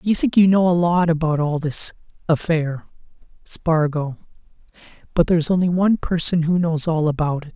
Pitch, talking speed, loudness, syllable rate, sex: 165 Hz, 165 wpm, -19 LUFS, 5.2 syllables/s, male